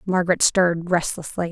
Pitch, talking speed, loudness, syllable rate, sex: 175 Hz, 120 wpm, -20 LUFS, 5.8 syllables/s, female